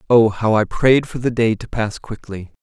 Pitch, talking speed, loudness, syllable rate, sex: 115 Hz, 230 wpm, -17 LUFS, 4.7 syllables/s, male